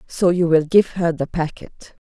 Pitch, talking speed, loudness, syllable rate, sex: 170 Hz, 175 wpm, -18 LUFS, 3.8 syllables/s, female